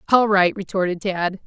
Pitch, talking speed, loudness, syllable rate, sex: 190 Hz, 165 wpm, -20 LUFS, 5.2 syllables/s, female